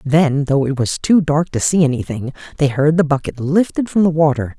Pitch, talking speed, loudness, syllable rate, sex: 150 Hz, 220 wpm, -16 LUFS, 5.2 syllables/s, male